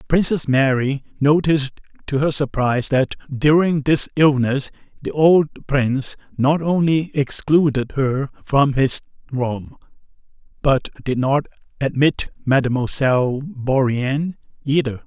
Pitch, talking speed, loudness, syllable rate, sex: 140 Hz, 110 wpm, -19 LUFS, 4.1 syllables/s, male